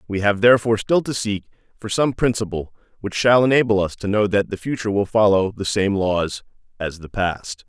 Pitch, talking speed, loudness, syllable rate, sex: 105 Hz, 205 wpm, -20 LUFS, 5.5 syllables/s, male